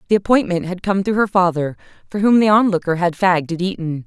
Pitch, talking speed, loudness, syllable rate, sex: 185 Hz, 220 wpm, -17 LUFS, 6.2 syllables/s, female